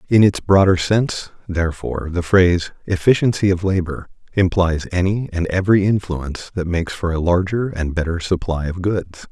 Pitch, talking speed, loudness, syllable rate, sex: 90 Hz, 160 wpm, -19 LUFS, 5.4 syllables/s, male